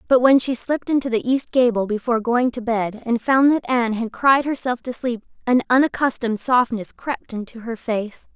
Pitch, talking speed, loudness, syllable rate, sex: 240 Hz, 200 wpm, -20 LUFS, 5.3 syllables/s, female